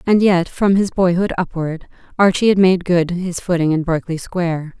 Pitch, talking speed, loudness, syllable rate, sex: 175 Hz, 190 wpm, -17 LUFS, 5.1 syllables/s, female